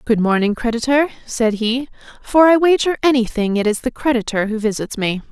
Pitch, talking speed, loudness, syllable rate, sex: 240 Hz, 180 wpm, -17 LUFS, 5.4 syllables/s, female